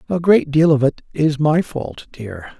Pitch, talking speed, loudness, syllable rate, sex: 145 Hz, 210 wpm, -17 LUFS, 4.0 syllables/s, male